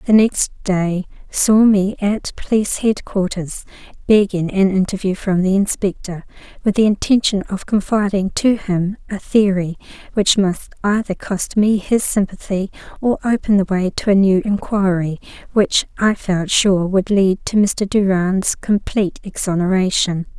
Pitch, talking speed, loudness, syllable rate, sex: 195 Hz, 145 wpm, -17 LUFS, 4.4 syllables/s, female